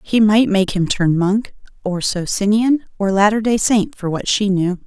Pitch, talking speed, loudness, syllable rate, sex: 205 Hz, 195 wpm, -17 LUFS, 4.5 syllables/s, female